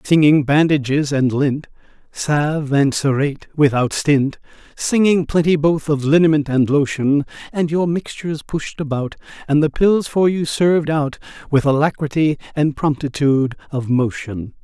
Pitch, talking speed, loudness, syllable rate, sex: 145 Hz, 140 wpm, -17 LUFS, 4.6 syllables/s, male